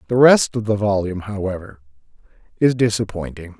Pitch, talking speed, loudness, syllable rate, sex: 100 Hz, 135 wpm, -18 LUFS, 5.8 syllables/s, male